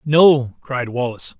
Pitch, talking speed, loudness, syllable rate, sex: 130 Hz, 130 wpm, -18 LUFS, 4.0 syllables/s, male